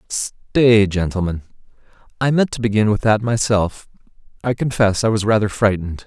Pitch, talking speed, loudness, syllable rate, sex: 110 Hz, 150 wpm, -18 LUFS, 5.2 syllables/s, male